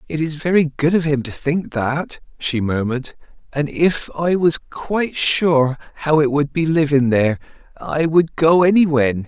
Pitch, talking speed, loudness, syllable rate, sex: 150 Hz, 180 wpm, -18 LUFS, 4.5 syllables/s, male